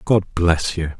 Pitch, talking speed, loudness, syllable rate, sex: 85 Hz, 180 wpm, -19 LUFS, 4.0 syllables/s, male